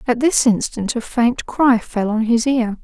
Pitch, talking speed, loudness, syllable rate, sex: 235 Hz, 210 wpm, -17 LUFS, 4.1 syllables/s, female